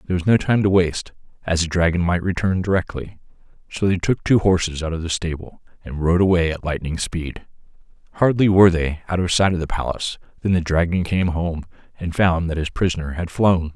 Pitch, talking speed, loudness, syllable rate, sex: 85 Hz, 210 wpm, -20 LUFS, 5.8 syllables/s, male